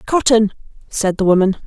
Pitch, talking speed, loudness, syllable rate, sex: 210 Hz, 145 wpm, -15 LUFS, 5.4 syllables/s, female